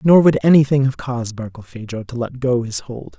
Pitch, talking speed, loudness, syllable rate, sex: 125 Hz, 205 wpm, -17 LUFS, 5.6 syllables/s, male